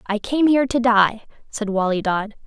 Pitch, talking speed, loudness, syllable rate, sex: 225 Hz, 195 wpm, -19 LUFS, 4.9 syllables/s, female